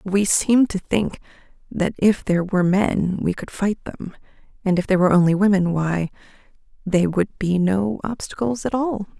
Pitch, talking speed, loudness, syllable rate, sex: 195 Hz, 170 wpm, -20 LUFS, 5.0 syllables/s, female